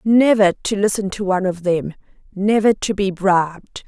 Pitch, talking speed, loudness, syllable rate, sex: 195 Hz, 170 wpm, -18 LUFS, 5.0 syllables/s, female